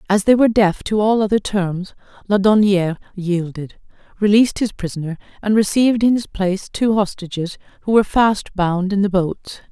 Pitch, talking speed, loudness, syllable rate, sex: 200 Hz, 165 wpm, -17 LUFS, 5.4 syllables/s, female